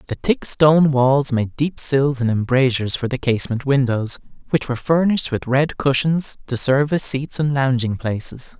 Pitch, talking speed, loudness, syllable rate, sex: 135 Hz, 180 wpm, -18 LUFS, 5.0 syllables/s, male